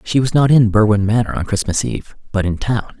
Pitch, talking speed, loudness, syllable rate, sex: 110 Hz, 240 wpm, -16 LUFS, 5.9 syllables/s, male